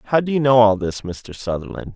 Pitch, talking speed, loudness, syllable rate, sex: 110 Hz, 245 wpm, -18 LUFS, 5.9 syllables/s, male